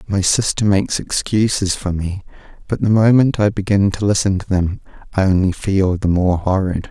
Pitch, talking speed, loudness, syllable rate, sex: 95 Hz, 180 wpm, -17 LUFS, 5.0 syllables/s, male